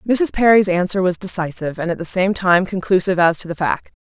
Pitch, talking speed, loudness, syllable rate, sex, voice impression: 185 Hz, 225 wpm, -17 LUFS, 6.1 syllables/s, female, feminine, very adult-like, intellectual, slightly calm, elegant